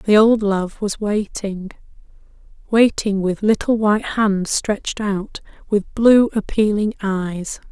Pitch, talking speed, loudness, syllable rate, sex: 205 Hz, 125 wpm, -18 LUFS, 3.7 syllables/s, female